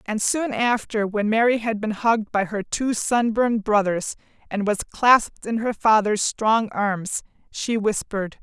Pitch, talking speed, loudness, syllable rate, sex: 215 Hz, 165 wpm, -22 LUFS, 4.4 syllables/s, female